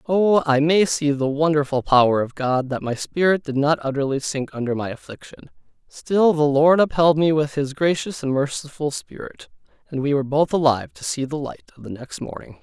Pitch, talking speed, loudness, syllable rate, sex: 145 Hz, 205 wpm, -20 LUFS, 5.4 syllables/s, male